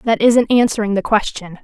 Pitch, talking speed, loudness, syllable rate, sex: 215 Hz, 185 wpm, -15 LUFS, 5.2 syllables/s, female